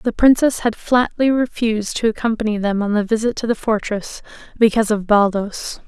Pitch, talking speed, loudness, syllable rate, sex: 220 Hz, 175 wpm, -18 LUFS, 5.3 syllables/s, female